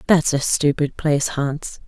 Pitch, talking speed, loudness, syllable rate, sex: 145 Hz, 160 wpm, -20 LUFS, 4.2 syllables/s, female